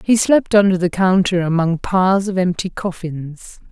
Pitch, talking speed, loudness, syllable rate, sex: 185 Hz, 160 wpm, -16 LUFS, 4.5 syllables/s, female